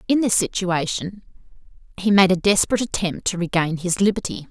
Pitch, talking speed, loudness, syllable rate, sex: 185 Hz, 160 wpm, -20 LUFS, 5.8 syllables/s, female